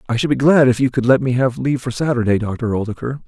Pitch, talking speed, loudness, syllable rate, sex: 125 Hz, 275 wpm, -17 LUFS, 6.5 syllables/s, male